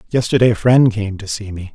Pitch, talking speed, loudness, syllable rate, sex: 105 Hz, 240 wpm, -16 LUFS, 5.9 syllables/s, male